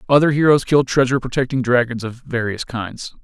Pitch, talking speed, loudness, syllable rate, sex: 125 Hz, 165 wpm, -18 LUFS, 5.7 syllables/s, male